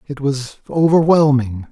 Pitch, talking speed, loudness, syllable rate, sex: 140 Hz, 105 wpm, -16 LUFS, 4.1 syllables/s, male